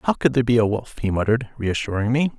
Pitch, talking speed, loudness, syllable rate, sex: 115 Hz, 250 wpm, -21 LUFS, 6.8 syllables/s, male